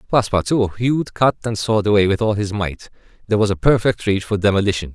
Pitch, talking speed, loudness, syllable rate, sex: 105 Hz, 205 wpm, -18 LUFS, 6.6 syllables/s, male